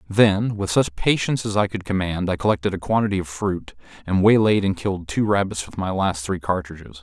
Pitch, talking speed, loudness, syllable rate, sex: 95 Hz, 215 wpm, -21 LUFS, 5.7 syllables/s, male